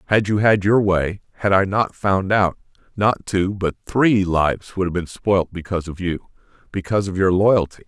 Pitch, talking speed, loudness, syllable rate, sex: 95 Hz, 190 wpm, -19 LUFS, 4.9 syllables/s, male